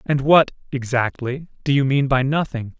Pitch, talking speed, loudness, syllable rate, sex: 135 Hz, 130 wpm, -20 LUFS, 4.7 syllables/s, male